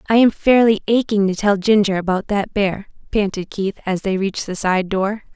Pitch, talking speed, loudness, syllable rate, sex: 200 Hz, 200 wpm, -18 LUFS, 5.1 syllables/s, female